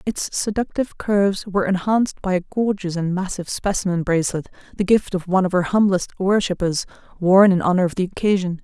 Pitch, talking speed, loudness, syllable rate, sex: 190 Hz, 180 wpm, -20 LUFS, 6.1 syllables/s, female